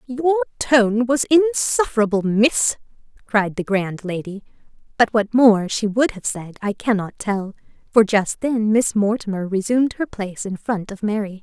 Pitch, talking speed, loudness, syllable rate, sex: 220 Hz, 170 wpm, -19 LUFS, 4.5 syllables/s, female